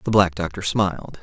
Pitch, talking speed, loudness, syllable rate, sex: 90 Hz, 195 wpm, -22 LUFS, 5.4 syllables/s, male